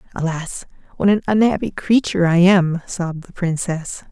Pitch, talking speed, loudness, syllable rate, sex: 180 Hz, 145 wpm, -18 LUFS, 5.0 syllables/s, female